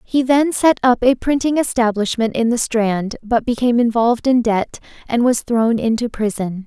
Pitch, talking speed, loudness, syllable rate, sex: 235 Hz, 180 wpm, -17 LUFS, 4.8 syllables/s, female